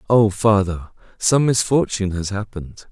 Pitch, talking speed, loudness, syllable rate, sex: 100 Hz, 125 wpm, -19 LUFS, 4.9 syllables/s, male